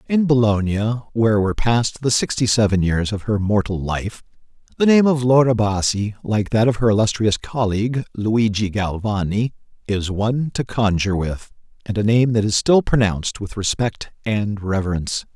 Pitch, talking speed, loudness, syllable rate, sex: 110 Hz, 165 wpm, -19 LUFS, 5.0 syllables/s, male